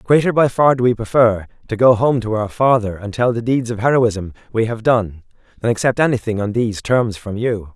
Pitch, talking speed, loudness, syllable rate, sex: 115 Hz, 225 wpm, -17 LUFS, 5.4 syllables/s, male